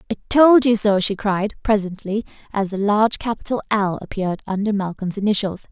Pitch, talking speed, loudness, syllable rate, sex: 205 Hz, 170 wpm, -19 LUFS, 5.6 syllables/s, female